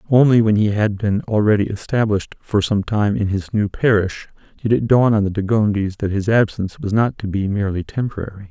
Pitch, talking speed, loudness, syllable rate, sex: 105 Hz, 210 wpm, -18 LUFS, 5.7 syllables/s, male